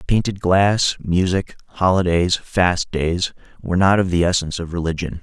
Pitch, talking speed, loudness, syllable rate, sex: 90 Hz, 150 wpm, -19 LUFS, 4.8 syllables/s, male